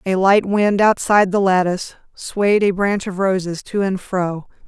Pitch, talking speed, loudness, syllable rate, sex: 190 Hz, 180 wpm, -17 LUFS, 4.5 syllables/s, female